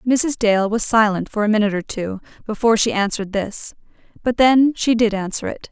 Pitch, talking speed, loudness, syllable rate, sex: 215 Hz, 200 wpm, -18 LUFS, 5.7 syllables/s, female